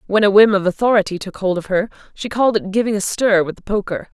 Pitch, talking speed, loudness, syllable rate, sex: 200 Hz, 260 wpm, -17 LUFS, 6.5 syllables/s, female